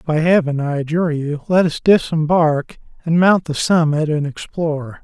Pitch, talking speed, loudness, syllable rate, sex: 160 Hz, 165 wpm, -17 LUFS, 4.8 syllables/s, male